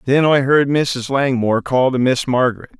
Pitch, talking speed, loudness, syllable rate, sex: 130 Hz, 195 wpm, -16 LUFS, 5.0 syllables/s, male